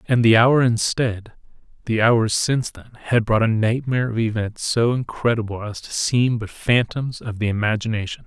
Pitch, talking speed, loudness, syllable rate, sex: 115 Hz, 175 wpm, -20 LUFS, 4.9 syllables/s, male